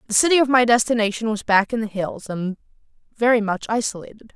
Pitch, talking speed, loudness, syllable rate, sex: 220 Hz, 195 wpm, -20 LUFS, 6.1 syllables/s, female